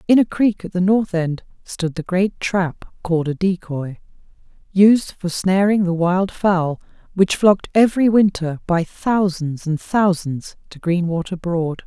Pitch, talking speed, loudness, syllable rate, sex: 180 Hz, 155 wpm, -19 LUFS, 4.0 syllables/s, female